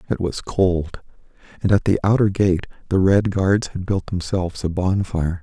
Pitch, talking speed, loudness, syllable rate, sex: 95 Hz, 190 wpm, -20 LUFS, 4.6 syllables/s, male